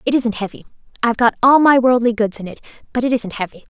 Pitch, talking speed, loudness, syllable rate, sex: 235 Hz, 240 wpm, -16 LUFS, 6.8 syllables/s, female